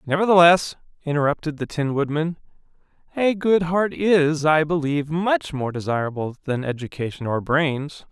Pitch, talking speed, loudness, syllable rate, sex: 155 Hz, 135 wpm, -21 LUFS, 4.9 syllables/s, male